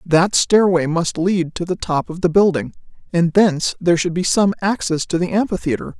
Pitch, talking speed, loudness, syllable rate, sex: 180 Hz, 200 wpm, -17 LUFS, 5.2 syllables/s, female